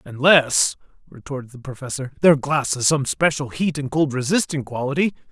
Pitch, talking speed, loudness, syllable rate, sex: 140 Hz, 160 wpm, -20 LUFS, 5.2 syllables/s, male